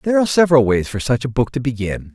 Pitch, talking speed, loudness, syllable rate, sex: 130 Hz, 280 wpm, -17 LUFS, 7.3 syllables/s, male